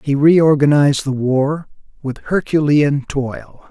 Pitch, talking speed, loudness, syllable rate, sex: 145 Hz, 115 wpm, -15 LUFS, 3.8 syllables/s, male